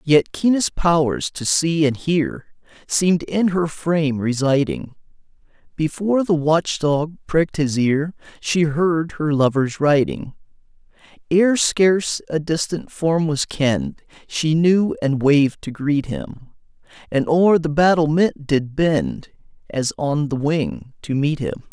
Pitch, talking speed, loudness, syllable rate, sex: 155 Hz, 140 wpm, -19 LUFS, 3.7 syllables/s, male